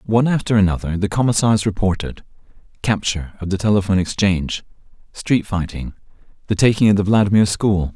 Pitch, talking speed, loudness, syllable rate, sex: 100 Hz, 135 wpm, -18 LUFS, 6.2 syllables/s, male